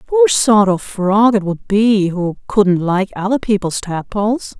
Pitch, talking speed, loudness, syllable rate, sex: 205 Hz, 170 wpm, -15 LUFS, 4.0 syllables/s, female